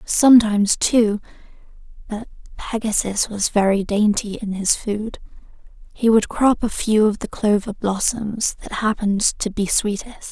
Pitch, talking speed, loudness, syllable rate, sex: 210 Hz, 140 wpm, -19 LUFS, 3.6 syllables/s, female